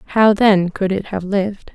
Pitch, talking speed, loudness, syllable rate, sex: 195 Hz, 205 wpm, -17 LUFS, 4.1 syllables/s, female